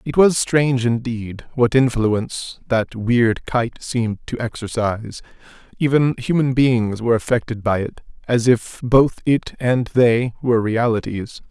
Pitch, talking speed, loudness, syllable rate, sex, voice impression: 120 Hz, 140 wpm, -19 LUFS, 4.3 syllables/s, male, masculine, adult-like, fluent, slightly cool, refreshing, slightly unique